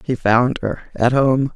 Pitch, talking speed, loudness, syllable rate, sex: 125 Hz, 195 wpm, -17 LUFS, 3.9 syllables/s, female